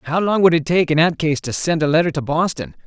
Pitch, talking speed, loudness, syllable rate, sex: 160 Hz, 295 wpm, -17 LUFS, 6.1 syllables/s, male